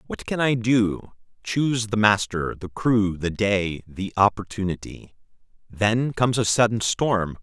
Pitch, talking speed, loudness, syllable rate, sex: 105 Hz, 135 wpm, -22 LUFS, 4.1 syllables/s, male